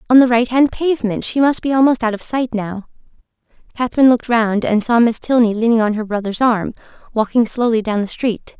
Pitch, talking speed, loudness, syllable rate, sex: 235 Hz, 195 wpm, -16 LUFS, 6.0 syllables/s, female